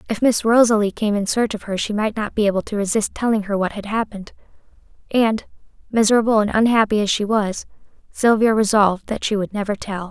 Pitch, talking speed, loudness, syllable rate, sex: 210 Hz, 200 wpm, -19 LUFS, 6.0 syllables/s, female